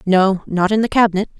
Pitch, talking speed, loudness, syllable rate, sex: 200 Hz, 170 wpm, -16 LUFS, 6.0 syllables/s, female